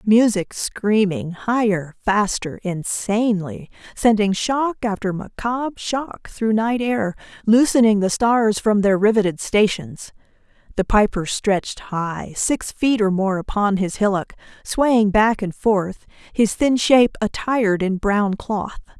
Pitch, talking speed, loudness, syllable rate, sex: 210 Hz, 135 wpm, -19 LUFS, 3.9 syllables/s, female